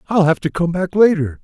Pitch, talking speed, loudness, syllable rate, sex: 170 Hz, 250 wpm, -16 LUFS, 5.3 syllables/s, male